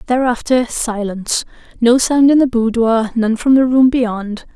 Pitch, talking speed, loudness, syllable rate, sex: 240 Hz, 160 wpm, -14 LUFS, 4.4 syllables/s, female